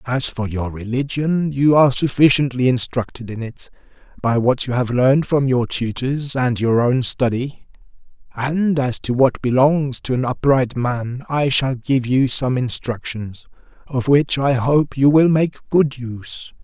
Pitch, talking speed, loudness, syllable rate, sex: 130 Hz, 165 wpm, -18 LUFS, 4.1 syllables/s, male